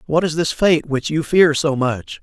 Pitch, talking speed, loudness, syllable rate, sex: 150 Hz, 240 wpm, -17 LUFS, 4.3 syllables/s, male